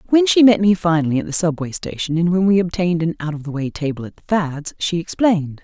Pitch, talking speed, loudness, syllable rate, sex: 170 Hz, 255 wpm, -18 LUFS, 6.3 syllables/s, female